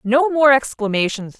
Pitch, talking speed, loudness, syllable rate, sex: 250 Hz, 130 wpm, -16 LUFS, 4.7 syllables/s, female